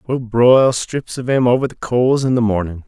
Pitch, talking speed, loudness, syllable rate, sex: 120 Hz, 230 wpm, -16 LUFS, 5.2 syllables/s, male